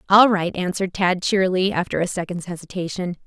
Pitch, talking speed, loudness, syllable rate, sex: 185 Hz, 165 wpm, -21 LUFS, 6.0 syllables/s, female